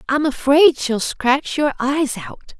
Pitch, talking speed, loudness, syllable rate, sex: 280 Hz, 160 wpm, -17 LUFS, 3.7 syllables/s, female